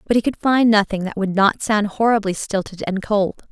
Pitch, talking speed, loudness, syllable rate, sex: 205 Hz, 220 wpm, -19 LUFS, 5.2 syllables/s, female